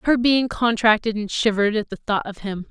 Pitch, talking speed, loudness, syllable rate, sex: 220 Hz, 220 wpm, -20 LUFS, 5.8 syllables/s, female